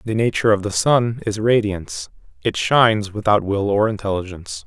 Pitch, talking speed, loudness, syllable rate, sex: 105 Hz, 165 wpm, -19 LUFS, 5.5 syllables/s, male